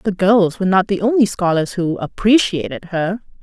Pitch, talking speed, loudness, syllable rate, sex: 190 Hz, 175 wpm, -17 LUFS, 5.0 syllables/s, female